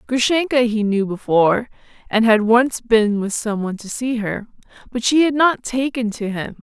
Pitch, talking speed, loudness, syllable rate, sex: 230 Hz, 190 wpm, -18 LUFS, 4.8 syllables/s, female